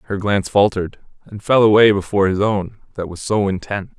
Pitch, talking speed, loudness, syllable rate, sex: 100 Hz, 195 wpm, -17 LUFS, 6.1 syllables/s, male